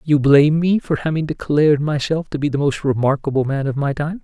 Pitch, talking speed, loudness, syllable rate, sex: 145 Hz, 225 wpm, -18 LUFS, 5.8 syllables/s, male